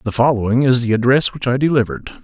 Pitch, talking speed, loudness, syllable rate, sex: 120 Hz, 215 wpm, -16 LUFS, 7.0 syllables/s, male